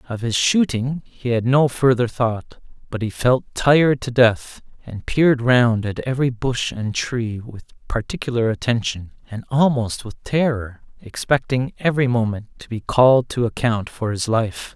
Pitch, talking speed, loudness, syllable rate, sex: 120 Hz, 165 wpm, -19 LUFS, 4.5 syllables/s, male